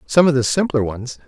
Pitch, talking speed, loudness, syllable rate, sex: 135 Hz, 235 wpm, -18 LUFS, 5.5 syllables/s, male